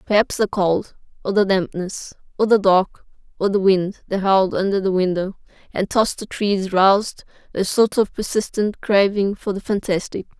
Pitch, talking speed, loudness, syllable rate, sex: 195 Hz, 175 wpm, -19 LUFS, 4.9 syllables/s, female